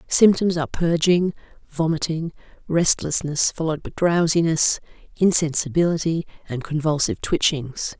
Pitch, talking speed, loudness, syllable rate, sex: 160 Hz, 90 wpm, -21 LUFS, 4.9 syllables/s, female